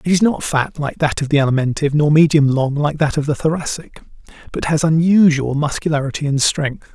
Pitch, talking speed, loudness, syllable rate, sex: 150 Hz, 200 wpm, -16 LUFS, 5.7 syllables/s, male